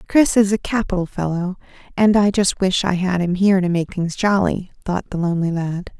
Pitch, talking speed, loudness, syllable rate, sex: 185 Hz, 210 wpm, -19 LUFS, 5.4 syllables/s, female